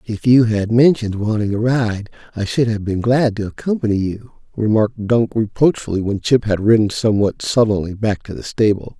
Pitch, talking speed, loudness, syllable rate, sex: 110 Hz, 185 wpm, -17 LUFS, 5.4 syllables/s, male